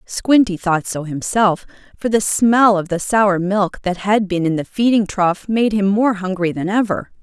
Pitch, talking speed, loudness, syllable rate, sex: 200 Hz, 200 wpm, -17 LUFS, 4.4 syllables/s, female